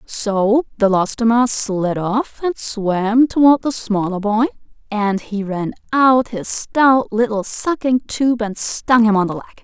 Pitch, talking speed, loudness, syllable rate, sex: 225 Hz, 155 wpm, -17 LUFS, 3.7 syllables/s, female